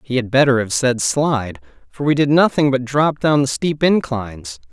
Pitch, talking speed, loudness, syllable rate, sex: 130 Hz, 205 wpm, -17 LUFS, 4.9 syllables/s, male